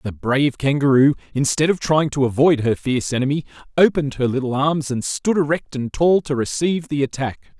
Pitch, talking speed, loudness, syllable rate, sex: 140 Hz, 190 wpm, -19 LUFS, 5.6 syllables/s, male